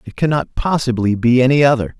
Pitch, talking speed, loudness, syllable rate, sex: 130 Hz, 180 wpm, -15 LUFS, 6.0 syllables/s, male